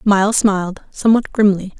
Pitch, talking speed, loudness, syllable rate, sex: 200 Hz, 135 wpm, -15 LUFS, 5.7 syllables/s, female